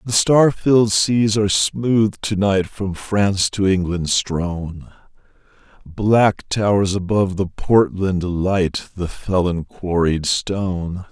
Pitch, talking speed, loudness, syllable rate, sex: 95 Hz, 125 wpm, -18 LUFS, 3.5 syllables/s, male